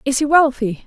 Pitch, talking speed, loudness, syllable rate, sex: 275 Hz, 210 wpm, -16 LUFS, 5.4 syllables/s, female